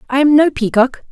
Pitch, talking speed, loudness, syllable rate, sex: 265 Hz, 215 wpm, -13 LUFS, 5.6 syllables/s, female